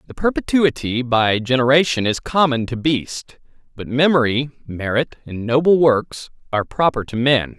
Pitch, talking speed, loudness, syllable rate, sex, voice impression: 130 Hz, 140 wpm, -18 LUFS, 4.8 syllables/s, male, very masculine, very adult-like, thick, very tensed, powerful, very bright, soft, very clear, very fluent, cool, intellectual, very refreshing, sincere, calm, very friendly, very reassuring, unique, slightly elegant, wild, sweet, very lively, slightly kind, slightly intense, light